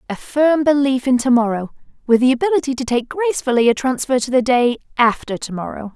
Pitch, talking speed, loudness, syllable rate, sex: 255 Hz, 200 wpm, -17 LUFS, 5.9 syllables/s, female